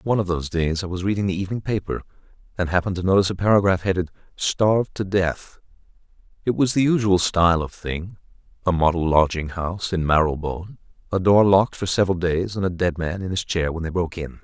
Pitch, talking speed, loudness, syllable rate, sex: 90 Hz, 210 wpm, -21 LUFS, 6.6 syllables/s, male